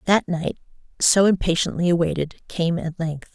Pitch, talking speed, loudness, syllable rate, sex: 170 Hz, 145 wpm, -21 LUFS, 4.9 syllables/s, female